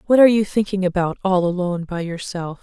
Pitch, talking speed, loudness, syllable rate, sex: 185 Hz, 205 wpm, -19 LUFS, 6.2 syllables/s, female